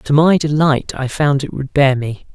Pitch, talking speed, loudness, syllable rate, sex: 140 Hz, 230 wpm, -16 LUFS, 4.5 syllables/s, male